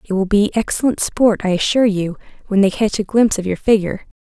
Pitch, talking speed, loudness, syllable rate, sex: 205 Hz, 225 wpm, -17 LUFS, 6.5 syllables/s, female